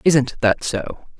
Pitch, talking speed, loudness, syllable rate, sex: 135 Hz, 150 wpm, -20 LUFS, 3.1 syllables/s, female